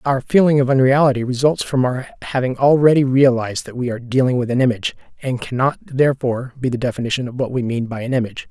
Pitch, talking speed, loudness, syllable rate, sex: 130 Hz, 210 wpm, -18 LUFS, 6.7 syllables/s, male